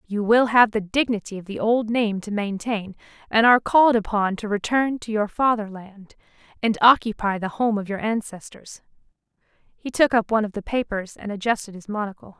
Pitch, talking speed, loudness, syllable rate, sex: 215 Hz, 185 wpm, -22 LUFS, 5.3 syllables/s, female